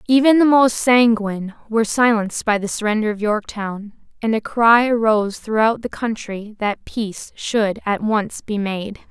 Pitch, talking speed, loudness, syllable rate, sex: 220 Hz, 165 wpm, -18 LUFS, 4.7 syllables/s, female